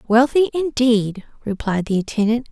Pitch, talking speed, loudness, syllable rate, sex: 235 Hz, 120 wpm, -19 LUFS, 4.7 syllables/s, female